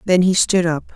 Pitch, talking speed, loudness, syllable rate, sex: 180 Hz, 250 wpm, -16 LUFS, 5.2 syllables/s, female